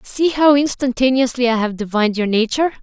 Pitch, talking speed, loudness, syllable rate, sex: 250 Hz, 170 wpm, -16 LUFS, 6.1 syllables/s, female